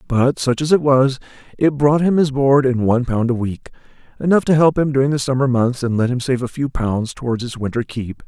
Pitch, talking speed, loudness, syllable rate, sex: 130 Hz, 240 wpm, -17 LUFS, 5.5 syllables/s, male